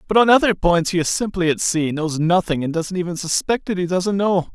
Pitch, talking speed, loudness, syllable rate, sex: 180 Hz, 250 wpm, -19 LUFS, 5.5 syllables/s, male